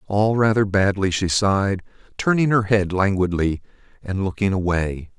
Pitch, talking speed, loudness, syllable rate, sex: 100 Hz, 140 wpm, -20 LUFS, 4.7 syllables/s, male